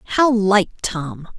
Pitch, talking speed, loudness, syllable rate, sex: 195 Hz, 130 wpm, -18 LUFS, 3.7 syllables/s, female